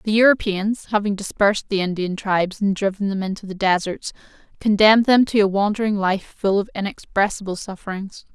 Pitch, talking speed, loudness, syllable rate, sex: 200 Hz, 165 wpm, -20 LUFS, 5.6 syllables/s, female